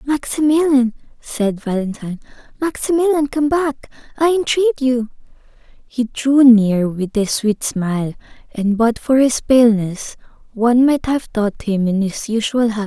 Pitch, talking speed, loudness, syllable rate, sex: 245 Hz, 145 wpm, -17 LUFS, 4.5 syllables/s, female